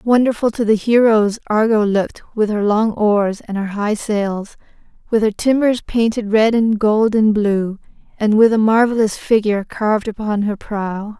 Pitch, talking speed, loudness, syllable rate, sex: 215 Hz, 170 wpm, -16 LUFS, 4.5 syllables/s, female